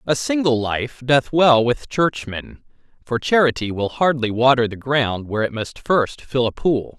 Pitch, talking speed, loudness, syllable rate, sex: 130 Hz, 180 wpm, -19 LUFS, 4.3 syllables/s, male